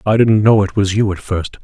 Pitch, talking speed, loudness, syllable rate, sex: 105 Hz, 295 wpm, -14 LUFS, 5.4 syllables/s, male